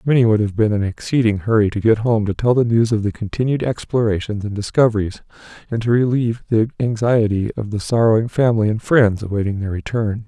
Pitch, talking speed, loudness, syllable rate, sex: 110 Hz, 200 wpm, -18 LUFS, 6.0 syllables/s, male